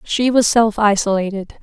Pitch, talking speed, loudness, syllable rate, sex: 210 Hz, 150 wpm, -16 LUFS, 4.6 syllables/s, female